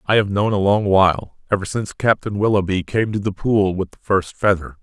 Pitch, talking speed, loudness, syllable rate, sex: 100 Hz, 225 wpm, -19 LUFS, 5.6 syllables/s, male